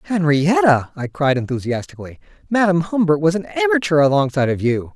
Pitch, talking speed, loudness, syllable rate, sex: 165 Hz, 145 wpm, -17 LUFS, 5.9 syllables/s, male